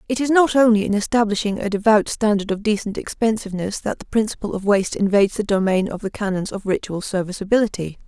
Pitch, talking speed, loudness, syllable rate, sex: 205 Hz, 195 wpm, -20 LUFS, 6.4 syllables/s, female